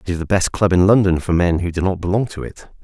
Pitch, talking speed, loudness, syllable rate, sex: 90 Hz, 315 wpm, -17 LUFS, 6.3 syllables/s, male